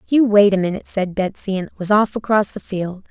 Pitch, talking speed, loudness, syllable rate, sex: 200 Hz, 230 wpm, -18 LUFS, 5.7 syllables/s, female